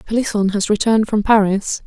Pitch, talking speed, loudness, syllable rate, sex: 210 Hz, 160 wpm, -16 LUFS, 6.0 syllables/s, female